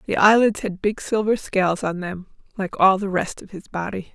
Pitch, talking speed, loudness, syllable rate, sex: 195 Hz, 215 wpm, -21 LUFS, 5.1 syllables/s, female